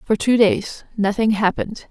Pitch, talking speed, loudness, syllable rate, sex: 210 Hz, 155 wpm, -19 LUFS, 4.7 syllables/s, female